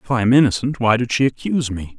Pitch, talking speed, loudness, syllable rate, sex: 120 Hz, 275 wpm, -18 LUFS, 6.9 syllables/s, male